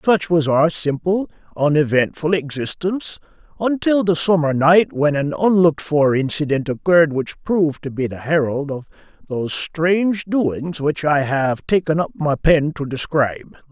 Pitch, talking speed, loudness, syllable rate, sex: 160 Hz, 155 wpm, -18 LUFS, 4.6 syllables/s, male